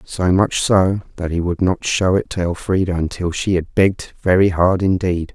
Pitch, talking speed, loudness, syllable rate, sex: 90 Hz, 200 wpm, -18 LUFS, 4.8 syllables/s, male